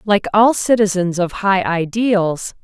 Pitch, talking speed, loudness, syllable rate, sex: 195 Hz, 135 wpm, -16 LUFS, 3.7 syllables/s, female